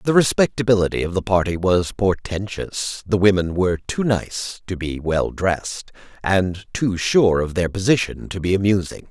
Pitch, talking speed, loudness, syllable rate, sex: 95 Hz, 165 wpm, -20 LUFS, 4.7 syllables/s, male